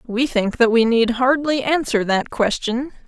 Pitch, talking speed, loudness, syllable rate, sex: 245 Hz, 175 wpm, -18 LUFS, 4.3 syllables/s, female